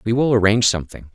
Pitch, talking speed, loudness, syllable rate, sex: 110 Hz, 210 wpm, -17 LUFS, 7.7 syllables/s, male